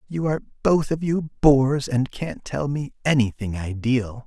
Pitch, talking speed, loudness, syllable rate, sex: 135 Hz, 170 wpm, -22 LUFS, 4.6 syllables/s, male